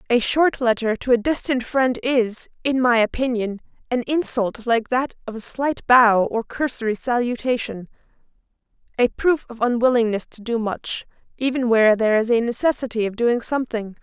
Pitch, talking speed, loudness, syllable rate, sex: 240 Hz, 160 wpm, -21 LUFS, 5.0 syllables/s, female